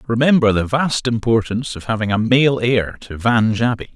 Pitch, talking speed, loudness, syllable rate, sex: 115 Hz, 180 wpm, -17 LUFS, 5.4 syllables/s, male